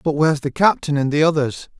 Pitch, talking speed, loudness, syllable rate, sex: 150 Hz, 235 wpm, -18 LUFS, 6.8 syllables/s, male